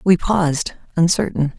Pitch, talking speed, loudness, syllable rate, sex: 170 Hz, 115 wpm, -18 LUFS, 4.7 syllables/s, female